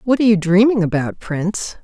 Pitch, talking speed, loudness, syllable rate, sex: 200 Hz, 195 wpm, -16 LUFS, 5.9 syllables/s, female